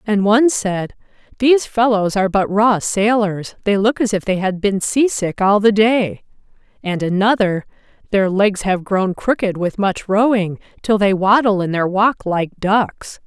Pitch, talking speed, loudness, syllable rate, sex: 205 Hz, 175 wpm, -16 LUFS, 4.4 syllables/s, female